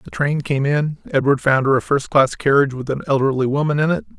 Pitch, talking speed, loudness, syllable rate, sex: 140 Hz, 230 wpm, -18 LUFS, 5.9 syllables/s, male